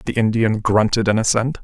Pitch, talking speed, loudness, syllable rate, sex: 110 Hz, 185 wpm, -17 LUFS, 5.5 syllables/s, male